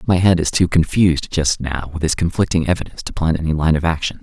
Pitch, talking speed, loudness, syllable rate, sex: 85 Hz, 240 wpm, -18 LUFS, 6.5 syllables/s, male